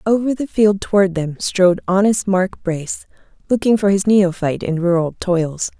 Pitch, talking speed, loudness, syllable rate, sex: 190 Hz, 165 wpm, -17 LUFS, 4.9 syllables/s, female